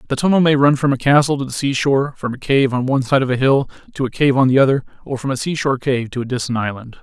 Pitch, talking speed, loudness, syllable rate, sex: 135 Hz, 290 wpm, -17 LUFS, 7.0 syllables/s, male